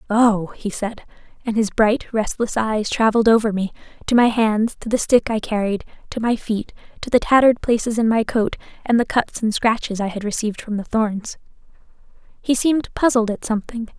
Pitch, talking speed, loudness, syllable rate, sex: 220 Hz, 195 wpm, -19 LUFS, 5.4 syllables/s, female